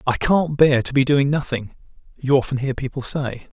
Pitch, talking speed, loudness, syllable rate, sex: 135 Hz, 200 wpm, -20 LUFS, 5.1 syllables/s, male